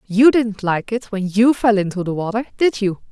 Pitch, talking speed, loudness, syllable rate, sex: 215 Hz, 230 wpm, -18 LUFS, 5.0 syllables/s, female